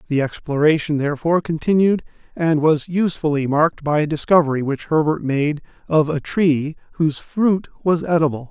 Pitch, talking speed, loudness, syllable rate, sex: 155 Hz, 150 wpm, -19 LUFS, 5.4 syllables/s, male